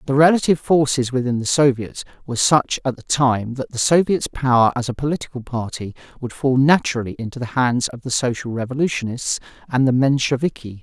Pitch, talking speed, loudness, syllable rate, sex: 130 Hz, 175 wpm, -19 LUFS, 5.8 syllables/s, male